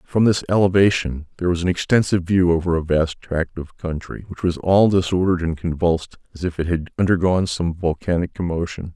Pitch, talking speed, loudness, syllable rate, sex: 85 Hz, 190 wpm, -20 LUFS, 5.8 syllables/s, male